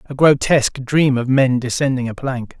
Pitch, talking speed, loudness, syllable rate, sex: 130 Hz, 185 wpm, -17 LUFS, 4.8 syllables/s, male